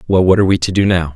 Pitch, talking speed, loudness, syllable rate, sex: 90 Hz, 365 wpm, -13 LUFS, 8.1 syllables/s, male